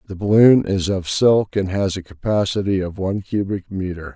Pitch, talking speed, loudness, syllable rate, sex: 95 Hz, 190 wpm, -19 LUFS, 5.1 syllables/s, male